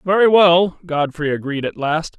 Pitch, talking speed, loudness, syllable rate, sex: 165 Hz, 165 wpm, -17 LUFS, 4.5 syllables/s, male